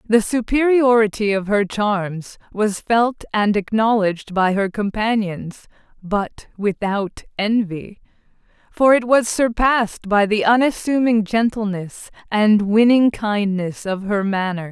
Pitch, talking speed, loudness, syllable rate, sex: 215 Hz, 120 wpm, -18 LUFS, 3.9 syllables/s, female